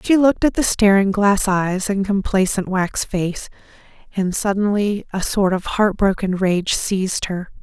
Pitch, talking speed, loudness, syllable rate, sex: 195 Hz, 155 wpm, -18 LUFS, 4.3 syllables/s, female